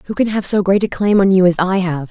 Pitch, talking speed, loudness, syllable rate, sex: 190 Hz, 340 wpm, -14 LUFS, 6.2 syllables/s, female